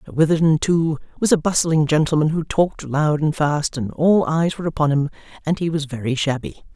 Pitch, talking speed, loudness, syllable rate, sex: 155 Hz, 205 wpm, -19 LUFS, 5.4 syllables/s, female